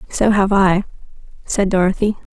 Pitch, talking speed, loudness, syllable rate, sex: 195 Hz, 130 wpm, -16 LUFS, 5.0 syllables/s, female